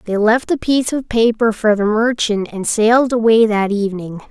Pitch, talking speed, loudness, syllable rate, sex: 220 Hz, 195 wpm, -15 LUFS, 5.2 syllables/s, female